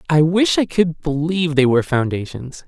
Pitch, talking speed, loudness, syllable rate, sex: 160 Hz, 180 wpm, -17 LUFS, 5.2 syllables/s, male